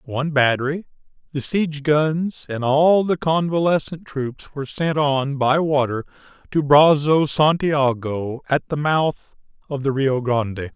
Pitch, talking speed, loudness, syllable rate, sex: 145 Hz, 140 wpm, -20 LUFS, 4.1 syllables/s, male